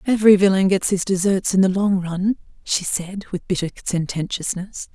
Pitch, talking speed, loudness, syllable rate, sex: 190 Hz, 170 wpm, -20 LUFS, 5.1 syllables/s, female